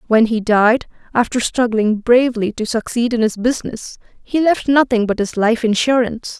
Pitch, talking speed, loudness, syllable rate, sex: 230 Hz, 170 wpm, -16 LUFS, 5.1 syllables/s, female